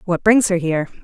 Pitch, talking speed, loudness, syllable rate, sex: 185 Hz, 235 wpm, -17 LUFS, 6.3 syllables/s, female